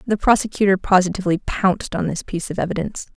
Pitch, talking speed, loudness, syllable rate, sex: 190 Hz, 170 wpm, -20 LUFS, 7.2 syllables/s, female